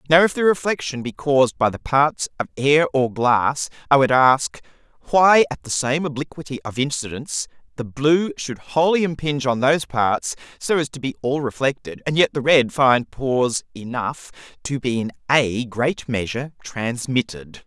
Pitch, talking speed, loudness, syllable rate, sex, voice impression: 135 Hz, 175 wpm, -20 LUFS, 4.7 syllables/s, male, very masculine, slightly adult-like, slightly middle-aged, slightly thick, slightly tensed, slightly weak, bright, soft, clear, very fluent, slightly cool, intellectual, refreshing, very sincere, calm, slightly friendly, slightly reassuring, very unique, slightly elegant, slightly wild, slightly sweet, slightly lively, kind, slightly modest, slightly light